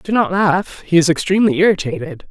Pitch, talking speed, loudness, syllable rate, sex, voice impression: 190 Hz, 180 wpm, -15 LUFS, 5.8 syllables/s, female, feminine, adult-like, tensed, slightly powerful, clear, fluent, intellectual, calm, elegant, lively, slightly sharp